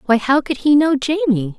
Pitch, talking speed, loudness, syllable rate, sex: 275 Hz, 230 wpm, -16 LUFS, 6.6 syllables/s, female